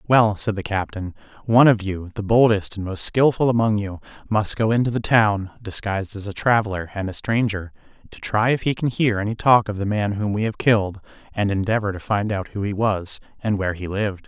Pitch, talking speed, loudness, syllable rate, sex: 105 Hz, 225 wpm, -21 LUFS, 5.6 syllables/s, male